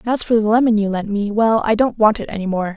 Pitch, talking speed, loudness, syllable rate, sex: 215 Hz, 325 wpm, -17 LUFS, 6.5 syllables/s, female